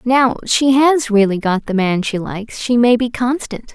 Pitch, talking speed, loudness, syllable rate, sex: 235 Hz, 210 wpm, -15 LUFS, 4.5 syllables/s, female